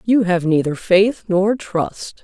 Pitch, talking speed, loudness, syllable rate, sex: 195 Hz, 160 wpm, -17 LUFS, 3.4 syllables/s, female